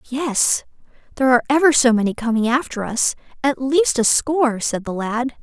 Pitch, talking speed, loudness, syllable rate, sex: 255 Hz, 175 wpm, -18 LUFS, 5.4 syllables/s, female